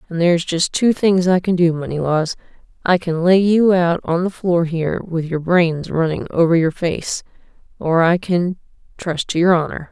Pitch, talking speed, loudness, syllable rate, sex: 170 Hz, 180 wpm, -17 LUFS, 4.7 syllables/s, female